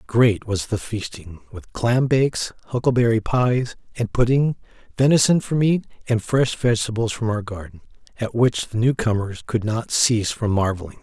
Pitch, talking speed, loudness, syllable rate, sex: 115 Hz, 160 wpm, -21 LUFS, 5.0 syllables/s, male